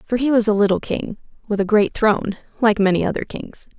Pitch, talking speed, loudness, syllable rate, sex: 215 Hz, 220 wpm, -19 LUFS, 5.9 syllables/s, female